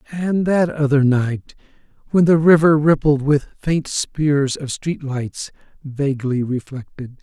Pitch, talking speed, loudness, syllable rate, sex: 145 Hz, 135 wpm, -18 LUFS, 3.9 syllables/s, male